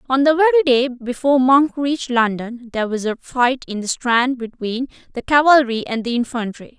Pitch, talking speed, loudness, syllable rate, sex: 255 Hz, 185 wpm, -18 LUFS, 5.3 syllables/s, female